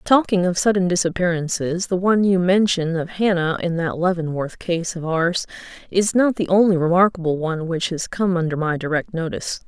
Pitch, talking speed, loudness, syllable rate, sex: 175 Hz, 180 wpm, -20 LUFS, 5.4 syllables/s, female